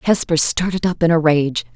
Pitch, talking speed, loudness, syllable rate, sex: 165 Hz, 205 wpm, -17 LUFS, 5.2 syllables/s, female